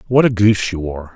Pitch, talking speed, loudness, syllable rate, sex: 100 Hz, 260 wpm, -16 LUFS, 7.2 syllables/s, male